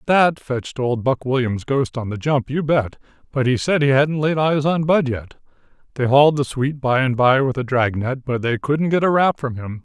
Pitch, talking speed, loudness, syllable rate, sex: 135 Hz, 245 wpm, -19 LUFS, 5.0 syllables/s, male